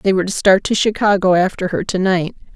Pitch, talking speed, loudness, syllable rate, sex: 190 Hz, 235 wpm, -16 LUFS, 6.1 syllables/s, female